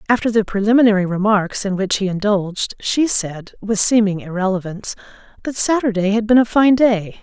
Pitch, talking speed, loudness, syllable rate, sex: 205 Hz, 165 wpm, -17 LUFS, 5.4 syllables/s, female